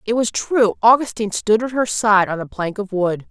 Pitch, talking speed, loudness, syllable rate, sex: 215 Hz, 235 wpm, -18 LUFS, 5.1 syllables/s, female